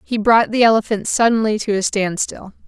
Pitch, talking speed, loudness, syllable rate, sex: 215 Hz, 180 wpm, -16 LUFS, 5.3 syllables/s, female